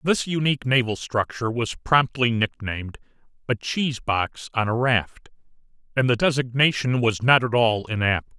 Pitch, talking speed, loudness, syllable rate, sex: 120 Hz, 150 wpm, -22 LUFS, 4.8 syllables/s, male